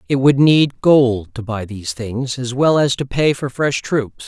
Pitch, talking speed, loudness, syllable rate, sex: 130 Hz, 225 wpm, -17 LUFS, 4.2 syllables/s, male